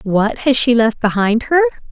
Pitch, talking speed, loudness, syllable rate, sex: 245 Hz, 190 wpm, -15 LUFS, 4.5 syllables/s, female